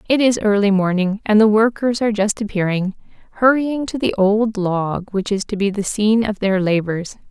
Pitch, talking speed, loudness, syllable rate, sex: 210 Hz, 195 wpm, -18 LUFS, 5.1 syllables/s, female